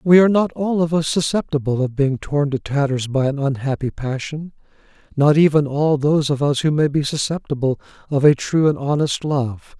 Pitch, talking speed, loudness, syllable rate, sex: 145 Hz, 195 wpm, -19 LUFS, 5.2 syllables/s, male